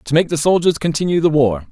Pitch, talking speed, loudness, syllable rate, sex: 155 Hz, 245 wpm, -16 LUFS, 6.3 syllables/s, male